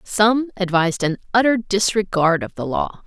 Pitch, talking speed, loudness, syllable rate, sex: 200 Hz, 155 wpm, -19 LUFS, 4.6 syllables/s, female